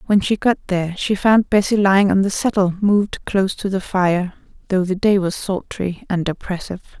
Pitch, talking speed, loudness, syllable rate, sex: 190 Hz, 195 wpm, -18 LUFS, 5.5 syllables/s, female